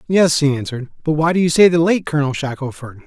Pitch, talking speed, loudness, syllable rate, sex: 150 Hz, 235 wpm, -16 LUFS, 6.6 syllables/s, male